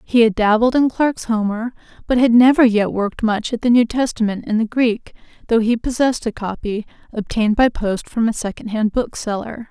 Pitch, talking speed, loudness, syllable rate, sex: 230 Hz, 190 wpm, -18 LUFS, 5.4 syllables/s, female